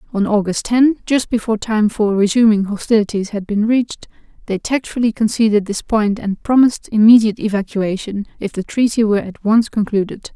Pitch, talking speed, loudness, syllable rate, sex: 215 Hz, 160 wpm, -16 LUFS, 5.6 syllables/s, female